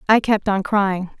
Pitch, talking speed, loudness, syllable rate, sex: 200 Hz, 200 wpm, -19 LUFS, 4.2 syllables/s, female